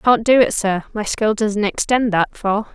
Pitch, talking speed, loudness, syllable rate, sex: 215 Hz, 220 wpm, -18 LUFS, 4.4 syllables/s, female